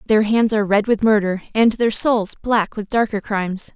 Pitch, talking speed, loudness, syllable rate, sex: 215 Hz, 210 wpm, -18 LUFS, 5.0 syllables/s, female